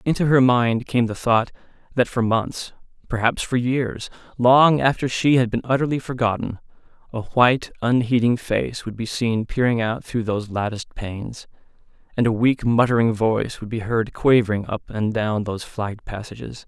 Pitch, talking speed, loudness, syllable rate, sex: 115 Hz, 170 wpm, -21 LUFS, 5.1 syllables/s, male